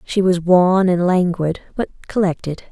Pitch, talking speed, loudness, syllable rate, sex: 180 Hz, 155 wpm, -17 LUFS, 4.1 syllables/s, female